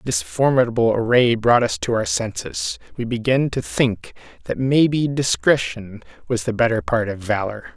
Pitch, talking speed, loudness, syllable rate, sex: 120 Hz, 160 wpm, -20 LUFS, 4.7 syllables/s, male